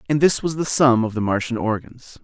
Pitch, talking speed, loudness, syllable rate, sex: 125 Hz, 240 wpm, -20 LUFS, 5.4 syllables/s, male